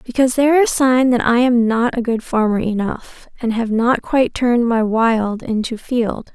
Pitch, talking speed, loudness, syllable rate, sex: 235 Hz, 210 wpm, -16 LUFS, 4.9 syllables/s, female